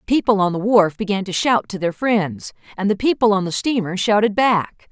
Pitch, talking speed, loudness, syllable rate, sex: 205 Hz, 230 wpm, -18 LUFS, 5.4 syllables/s, female